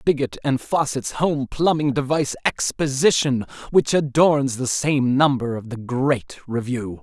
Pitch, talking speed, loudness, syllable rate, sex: 135 Hz, 135 wpm, -21 LUFS, 4.3 syllables/s, male